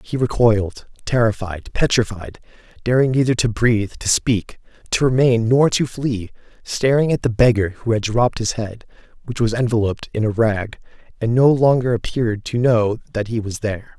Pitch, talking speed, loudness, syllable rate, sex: 115 Hz, 170 wpm, -19 LUFS, 5.2 syllables/s, male